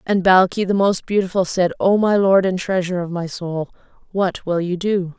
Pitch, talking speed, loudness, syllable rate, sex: 185 Hz, 210 wpm, -18 LUFS, 5.0 syllables/s, female